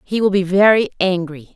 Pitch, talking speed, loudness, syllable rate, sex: 185 Hz, 195 wpm, -16 LUFS, 5.3 syllables/s, female